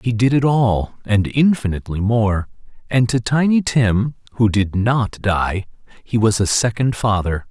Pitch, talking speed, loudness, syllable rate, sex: 115 Hz, 160 wpm, -18 LUFS, 4.2 syllables/s, male